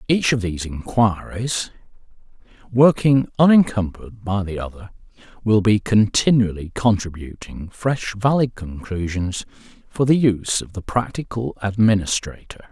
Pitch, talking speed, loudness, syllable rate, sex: 105 Hz, 110 wpm, -20 LUFS, 4.6 syllables/s, male